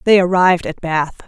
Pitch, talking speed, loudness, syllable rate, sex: 175 Hz, 190 wpm, -15 LUFS, 5.7 syllables/s, female